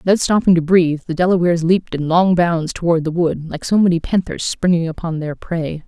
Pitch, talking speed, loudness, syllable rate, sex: 170 Hz, 215 wpm, -17 LUFS, 5.8 syllables/s, female